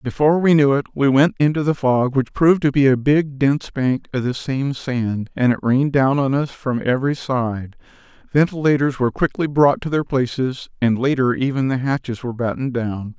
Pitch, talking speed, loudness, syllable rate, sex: 135 Hz, 205 wpm, -19 LUFS, 5.3 syllables/s, male